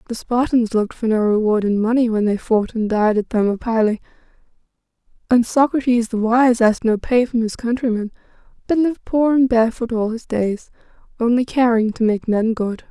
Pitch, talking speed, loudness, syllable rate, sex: 230 Hz, 180 wpm, -18 LUFS, 5.4 syllables/s, female